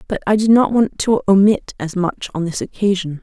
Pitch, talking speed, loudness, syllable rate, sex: 200 Hz, 225 wpm, -16 LUFS, 5.1 syllables/s, female